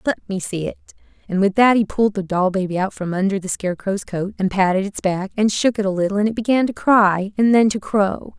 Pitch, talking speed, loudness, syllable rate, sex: 200 Hz, 260 wpm, -19 LUFS, 5.8 syllables/s, female